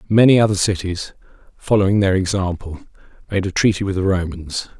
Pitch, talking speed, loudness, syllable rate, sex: 95 Hz, 150 wpm, -18 LUFS, 5.7 syllables/s, male